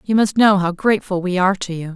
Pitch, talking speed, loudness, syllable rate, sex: 190 Hz, 275 wpm, -17 LUFS, 6.5 syllables/s, female